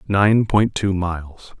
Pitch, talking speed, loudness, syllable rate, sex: 95 Hz, 150 wpm, -18 LUFS, 3.7 syllables/s, male